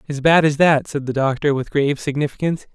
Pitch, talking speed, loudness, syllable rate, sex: 145 Hz, 220 wpm, -18 LUFS, 6.3 syllables/s, male